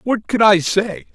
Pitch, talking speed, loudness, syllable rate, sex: 205 Hz, 210 wpm, -15 LUFS, 4.1 syllables/s, male